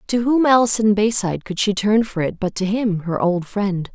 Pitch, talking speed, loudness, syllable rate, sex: 205 Hz, 245 wpm, -19 LUFS, 5.0 syllables/s, female